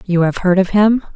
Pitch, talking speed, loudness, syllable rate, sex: 190 Hz, 260 wpm, -14 LUFS, 5.4 syllables/s, female